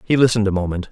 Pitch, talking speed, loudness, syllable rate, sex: 105 Hz, 265 wpm, -18 LUFS, 8.6 syllables/s, male